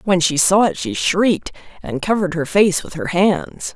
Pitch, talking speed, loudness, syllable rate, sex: 180 Hz, 210 wpm, -17 LUFS, 4.8 syllables/s, female